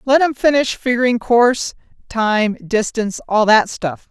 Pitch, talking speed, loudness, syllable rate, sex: 230 Hz, 145 wpm, -16 LUFS, 4.5 syllables/s, female